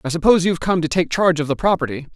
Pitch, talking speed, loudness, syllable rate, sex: 165 Hz, 305 wpm, -18 LUFS, 8.0 syllables/s, male